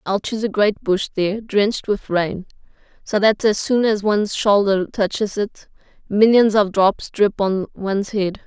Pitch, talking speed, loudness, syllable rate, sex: 205 Hz, 175 wpm, -19 LUFS, 4.6 syllables/s, female